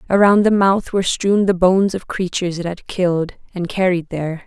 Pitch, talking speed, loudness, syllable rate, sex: 185 Hz, 200 wpm, -17 LUFS, 5.7 syllables/s, female